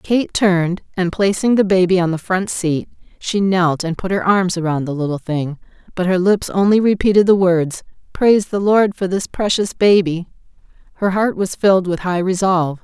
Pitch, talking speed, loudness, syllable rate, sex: 185 Hz, 190 wpm, -16 LUFS, 5.0 syllables/s, female